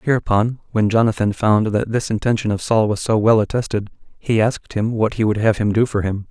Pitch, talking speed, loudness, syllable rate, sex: 110 Hz, 230 wpm, -18 LUFS, 5.7 syllables/s, male